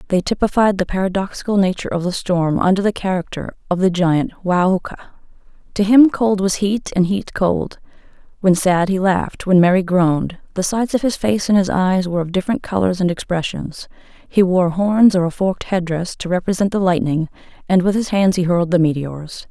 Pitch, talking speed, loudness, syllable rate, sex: 185 Hz, 195 wpm, -17 LUFS, 5.4 syllables/s, female